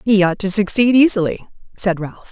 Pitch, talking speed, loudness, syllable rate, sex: 200 Hz, 180 wpm, -15 LUFS, 5.7 syllables/s, female